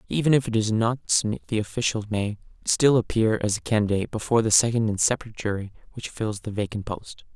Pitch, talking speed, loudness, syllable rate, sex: 110 Hz, 205 wpm, -24 LUFS, 6.3 syllables/s, male